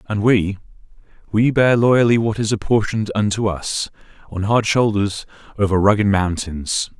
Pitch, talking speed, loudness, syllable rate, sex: 105 Hz, 130 wpm, -18 LUFS, 4.7 syllables/s, male